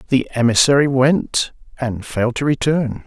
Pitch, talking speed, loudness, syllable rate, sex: 130 Hz, 135 wpm, -17 LUFS, 4.8 syllables/s, male